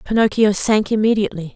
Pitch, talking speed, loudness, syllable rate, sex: 205 Hz, 115 wpm, -17 LUFS, 6.2 syllables/s, female